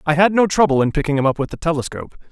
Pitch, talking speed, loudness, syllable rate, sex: 160 Hz, 285 wpm, -17 LUFS, 7.7 syllables/s, male